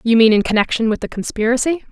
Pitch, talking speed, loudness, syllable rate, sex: 235 Hz, 220 wpm, -16 LUFS, 6.7 syllables/s, female